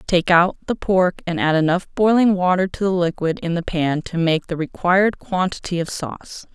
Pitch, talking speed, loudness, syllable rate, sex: 175 Hz, 200 wpm, -19 LUFS, 5.1 syllables/s, female